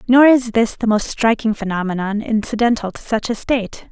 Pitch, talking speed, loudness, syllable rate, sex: 220 Hz, 185 wpm, -17 LUFS, 5.4 syllables/s, female